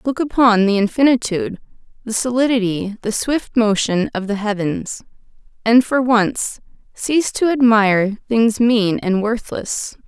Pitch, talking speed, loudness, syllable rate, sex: 225 Hz, 130 wpm, -17 LUFS, 4.3 syllables/s, female